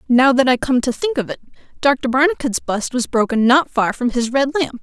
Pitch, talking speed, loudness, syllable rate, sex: 260 Hz, 235 wpm, -17 LUFS, 5.2 syllables/s, female